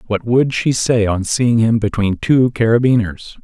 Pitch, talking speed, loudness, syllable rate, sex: 115 Hz, 175 wpm, -15 LUFS, 4.3 syllables/s, male